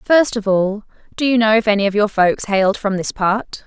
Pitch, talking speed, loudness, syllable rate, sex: 210 Hz, 245 wpm, -16 LUFS, 5.3 syllables/s, female